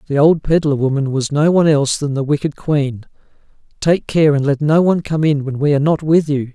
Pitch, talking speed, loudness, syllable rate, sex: 145 Hz, 240 wpm, -15 LUFS, 5.9 syllables/s, male